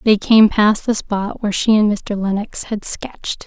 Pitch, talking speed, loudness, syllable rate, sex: 210 Hz, 210 wpm, -17 LUFS, 4.5 syllables/s, female